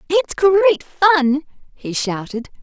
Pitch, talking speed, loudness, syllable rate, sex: 290 Hz, 115 wpm, -17 LUFS, 3.5 syllables/s, female